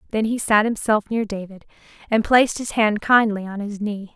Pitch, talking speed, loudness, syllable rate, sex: 215 Hz, 200 wpm, -20 LUFS, 5.2 syllables/s, female